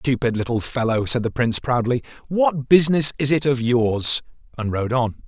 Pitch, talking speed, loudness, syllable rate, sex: 125 Hz, 180 wpm, -20 LUFS, 5.1 syllables/s, male